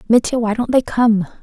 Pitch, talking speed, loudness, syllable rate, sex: 225 Hz, 210 wpm, -16 LUFS, 5.1 syllables/s, female